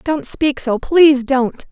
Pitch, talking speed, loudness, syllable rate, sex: 270 Hz, 175 wpm, -15 LUFS, 3.7 syllables/s, female